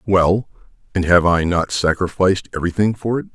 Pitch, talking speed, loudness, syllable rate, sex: 90 Hz, 160 wpm, -18 LUFS, 5.7 syllables/s, male